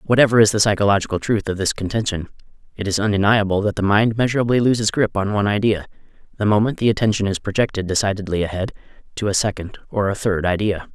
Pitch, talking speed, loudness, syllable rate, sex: 105 Hz, 190 wpm, -19 LUFS, 6.8 syllables/s, male